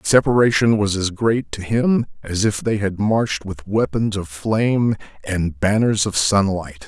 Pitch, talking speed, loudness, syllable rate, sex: 100 Hz, 175 wpm, -19 LUFS, 4.4 syllables/s, male